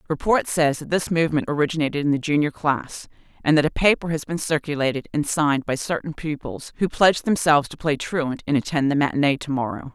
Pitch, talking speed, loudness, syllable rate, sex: 150 Hz, 205 wpm, -22 LUFS, 6.1 syllables/s, female